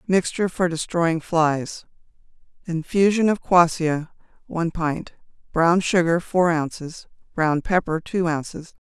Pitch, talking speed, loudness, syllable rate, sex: 170 Hz, 110 wpm, -21 LUFS, 4.1 syllables/s, female